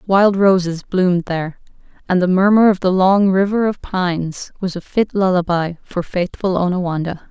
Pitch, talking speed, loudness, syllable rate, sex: 185 Hz, 165 wpm, -17 LUFS, 4.9 syllables/s, female